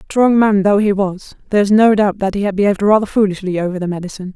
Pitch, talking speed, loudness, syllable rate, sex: 200 Hz, 250 wpm, -15 LUFS, 6.9 syllables/s, female